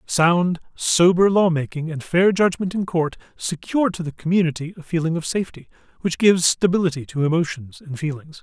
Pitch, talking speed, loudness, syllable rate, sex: 170 Hz, 165 wpm, -20 LUFS, 5.6 syllables/s, male